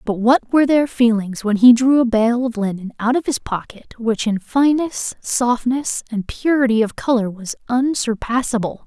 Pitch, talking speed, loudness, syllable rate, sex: 240 Hz, 175 wpm, -18 LUFS, 4.8 syllables/s, female